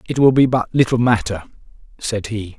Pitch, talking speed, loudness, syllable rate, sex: 115 Hz, 185 wpm, -17 LUFS, 5.5 syllables/s, male